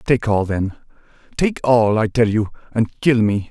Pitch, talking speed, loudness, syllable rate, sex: 115 Hz, 170 wpm, -18 LUFS, 4.3 syllables/s, male